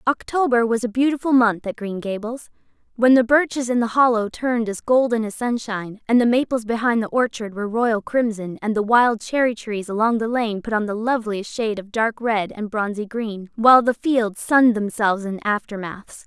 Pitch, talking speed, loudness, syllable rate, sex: 225 Hz, 200 wpm, -20 LUFS, 5.3 syllables/s, female